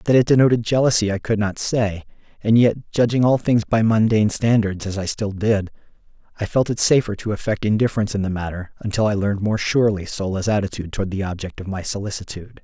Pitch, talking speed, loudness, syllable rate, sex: 105 Hz, 205 wpm, -20 LUFS, 6.4 syllables/s, male